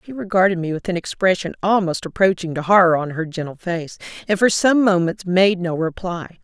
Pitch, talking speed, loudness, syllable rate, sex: 180 Hz, 195 wpm, -19 LUFS, 5.4 syllables/s, female